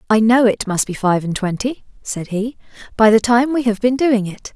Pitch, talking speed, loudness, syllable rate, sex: 225 Hz, 235 wpm, -17 LUFS, 5.0 syllables/s, female